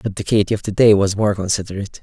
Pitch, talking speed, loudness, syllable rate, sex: 100 Hz, 265 wpm, -17 LUFS, 7.0 syllables/s, male